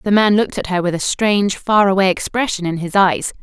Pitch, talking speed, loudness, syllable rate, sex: 195 Hz, 245 wpm, -16 LUFS, 5.7 syllables/s, female